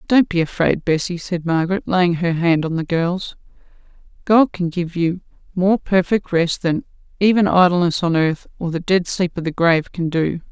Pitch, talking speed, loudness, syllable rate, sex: 175 Hz, 190 wpm, -18 LUFS, 4.9 syllables/s, female